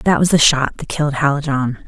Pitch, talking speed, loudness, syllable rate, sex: 145 Hz, 225 wpm, -16 LUFS, 5.5 syllables/s, female